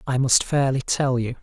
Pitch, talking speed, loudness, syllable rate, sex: 130 Hz, 210 wpm, -21 LUFS, 4.8 syllables/s, male